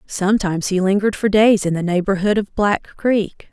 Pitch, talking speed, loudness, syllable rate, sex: 200 Hz, 190 wpm, -18 LUFS, 5.5 syllables/s, female